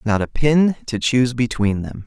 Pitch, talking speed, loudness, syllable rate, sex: 120 Hz, 205 wpm, -19 LUFS, 4.8 syllables/s, male